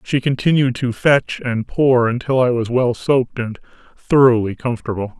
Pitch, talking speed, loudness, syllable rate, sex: 125 Hz, 160 wpm, -17 LUFS, 4.8 syllables/s, male